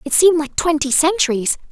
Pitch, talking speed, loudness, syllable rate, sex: 305 Hz, 175 wpm, -16 LUFS, 6.0 syllables/s, female